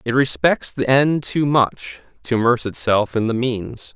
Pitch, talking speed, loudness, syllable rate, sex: 125 Hz, 180 wpm, -18 LUFS, 4.4 syllables/s, male